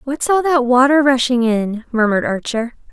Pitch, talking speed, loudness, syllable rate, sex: 255 Hz, 165 wpm, -15 LUFS, 5.0 syllables/s, female